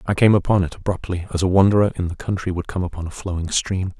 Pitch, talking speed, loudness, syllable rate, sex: 90 Hz, 255 wpm, -20 LUFS, 6.8 syllables/s, male